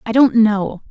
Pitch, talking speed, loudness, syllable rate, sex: 220 Hz, 200 wpm, -14 LUFS, 4.1 syllables/s, female